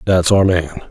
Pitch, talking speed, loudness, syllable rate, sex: 90 Hz, 200 wpm, -14 LUFS, 4.3 syllables/s, male